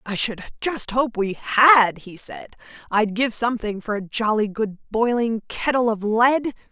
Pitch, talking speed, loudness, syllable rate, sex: 225 Hz, 170 wpm, -21 LUFS, 4.3 syllables/s, female